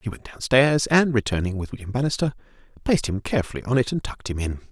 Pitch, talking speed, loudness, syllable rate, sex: 120 Hz, 215 wpm, -23 LUFS, 6.8 syllables/s, male